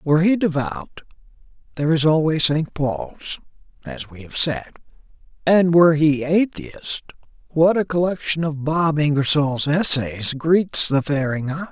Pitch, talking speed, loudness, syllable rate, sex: 155 Hz, 140 wpm, -19 LUFS, 4.2 syllables/s, male